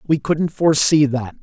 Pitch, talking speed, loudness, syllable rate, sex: 145 Hz, 170 wpm, -17 LUFS, 4.7 syllables/s, male